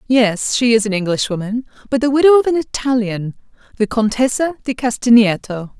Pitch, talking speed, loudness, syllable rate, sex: 235 Hz, 145 wpm, -16 LUFS, 5.4 syllables/s, female